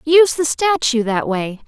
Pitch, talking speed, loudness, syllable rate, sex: 270 Hz, 180 wpm, -16 LUFS, 4.6 syllables/s, female